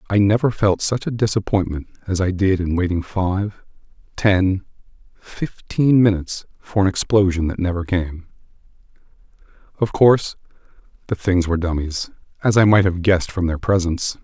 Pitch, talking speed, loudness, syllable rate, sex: 95 Hz, 150 wpm, -19 LUFS, 5.1 syllables/s, male